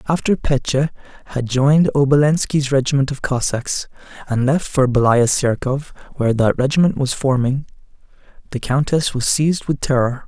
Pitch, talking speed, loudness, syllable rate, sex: 135 Hz, 140 wpm, -18 LUFS, 5.1 syllables/s, male